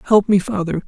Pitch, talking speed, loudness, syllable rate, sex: 185 Hz, 205 wpm, -17 LUFS, 6.2 syllables/s, male